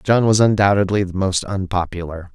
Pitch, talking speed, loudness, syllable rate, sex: 95 Hz, 155 wpm, -18 LUFS, 5.2 syllables/s, male